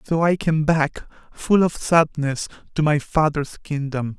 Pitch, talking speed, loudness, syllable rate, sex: 150 Hz, 160 wpm, -21 LUFS, 4.0 syllables/s, male